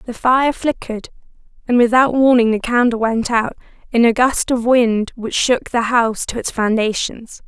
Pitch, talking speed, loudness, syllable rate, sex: 235 Hz, 175 wpm, -16 LUFS, 4.7 syllables/s, female